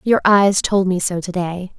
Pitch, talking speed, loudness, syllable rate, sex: 185 Hz, 200 wpm, -17 LUFS, 4.3 syllables/s, female